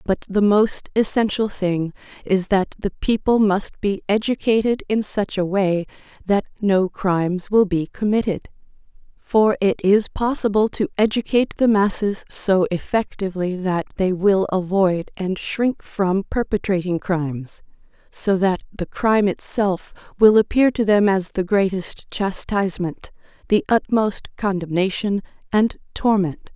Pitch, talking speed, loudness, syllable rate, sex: 200 Hz, 135 wpm, -20 LUFS, 4.3 syllables/s, female